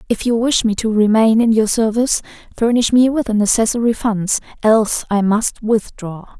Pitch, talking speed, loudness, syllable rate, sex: 220 Hz, 180 wpm, -15 LUFS, 5.1 syllables/s, female